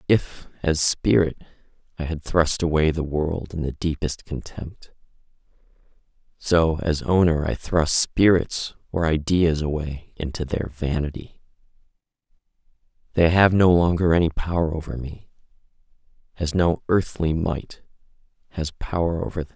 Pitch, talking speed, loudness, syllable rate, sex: 80 Hz, 130 wpm, -22 LUFS, 4.6 syllables/s, male